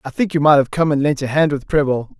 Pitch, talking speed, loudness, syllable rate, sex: 145 Hz, 330 wpm, -17 LUFS, 6.2 syllables/s, male